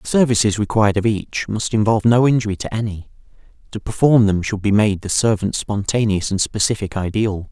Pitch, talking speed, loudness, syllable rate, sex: 105 Hz, 185 wpm, -18 LUFS, 5.7 syllables/s, male